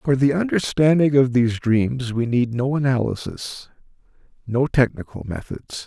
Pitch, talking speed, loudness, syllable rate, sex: 130 Hz, 135 wpm, -20 LUFS, 4.6 syllables/s, male